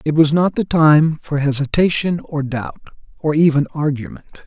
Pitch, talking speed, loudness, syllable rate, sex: 150 Hz, 160 wpm, -17 LUFS, 5.0 syllables/s, male